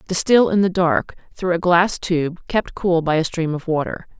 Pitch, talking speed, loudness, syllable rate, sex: 175 Hz, 215 wpm, -19 LUFS, 4.6 syllables/s, female